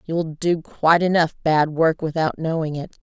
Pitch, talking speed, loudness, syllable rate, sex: 160 Hz, 175 wpm, -20 LUFS, 4.7 syllables/s, female